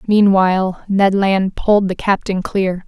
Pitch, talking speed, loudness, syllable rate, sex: 190 Hz, 145 wpm, -15 LUFS, 4.1 syllables/s, female